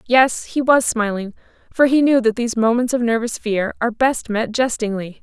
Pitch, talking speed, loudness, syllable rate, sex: 235 Hz, 195 wpm, -18 LUFS, 5.2 syllables/s, female